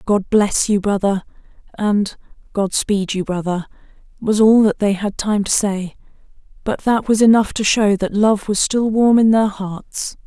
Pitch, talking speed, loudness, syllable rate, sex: 205 Hz, 180 wpm, -17 LUFS, 4.2 syllables/s, female